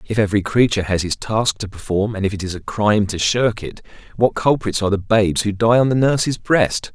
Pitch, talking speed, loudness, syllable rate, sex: 105 Hz, 240 wpm, -18 LUFS, 5.9 syllables/s, male